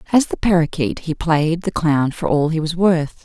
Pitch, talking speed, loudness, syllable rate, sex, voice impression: 165 Hz, 220 wpm, -18 LUFS, 4.8 syllables/s, female, very feminine, very adult-like, slightly intellectual, slightly calm, slightly elegant